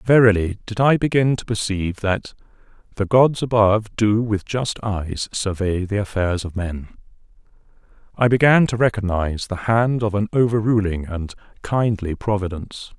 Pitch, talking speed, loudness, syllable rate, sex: 105 Hz, 145 wpm, -20 LUFS, 4.8 syllables/s, male